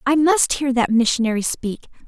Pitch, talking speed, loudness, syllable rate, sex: 255 Hz, 175 wpm, -18 LUFS, 5.3 syllables/s, female